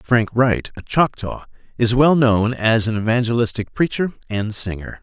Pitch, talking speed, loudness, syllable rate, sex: 115 Hz, 155 wpm, -19 LUFS, 4.6 syllables/s, male